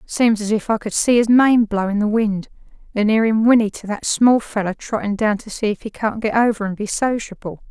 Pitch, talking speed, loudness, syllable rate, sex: 215 Hz, 250 wpm, -18 LUFS, 5.3 syllables/s, female